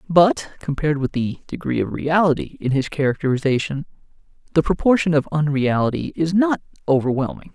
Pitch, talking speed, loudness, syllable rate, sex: 150 Hz, 135 wpm, -20 LUFS, 5.6 syllables/s, male